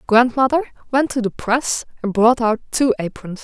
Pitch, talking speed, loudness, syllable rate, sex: 240 Hz, 175 wpm, -18 LUFS, 4.8 syllables/s, female